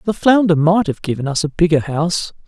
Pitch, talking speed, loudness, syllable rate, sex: 170 Hz, 220 wpm, -16 LUFS, 5.8 syllables/s, male